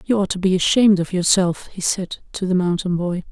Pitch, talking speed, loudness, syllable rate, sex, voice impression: 185 Hz, 235 wpm, -19 LUFS, 5.6 syllables/s, female, gender-neutral, slightly young, relaxed, weak, dark, slightly soft, raspy, intellectual, calm, friendly, reassuring, slightly unique, kind, modest